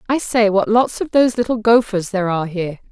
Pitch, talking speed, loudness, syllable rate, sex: 215 Hz, 225 wpm, -17 LUFS, 6.4 syllables/s, female